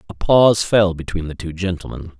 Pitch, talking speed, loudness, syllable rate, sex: 90 Hz, 190 wpm, -18 LUFS, 5.6 syllables/s, male